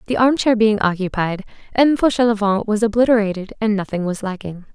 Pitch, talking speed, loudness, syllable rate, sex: 210 Hz, 165 wpm, -18 LUFS, 5.9 syllables/s, female